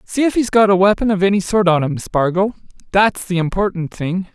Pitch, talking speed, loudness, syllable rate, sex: 195 Hz, 205 wpm, -16 LUFS, 5.6 syllables/s, male